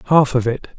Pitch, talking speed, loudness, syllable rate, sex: 130 Hz, 230 wpm, -17 LUFS, 6.3 syllables/s, male